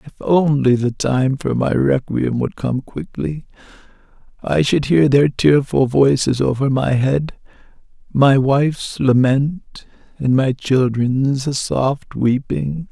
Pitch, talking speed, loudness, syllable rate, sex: 135 Hz, 125 wpm, -17 LUFS, 3.4 syllables/s, male